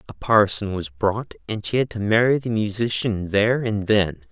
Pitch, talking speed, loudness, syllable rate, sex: 105 Hz, 195 wpm, -21 LUFS, 4.8 syllables/s, male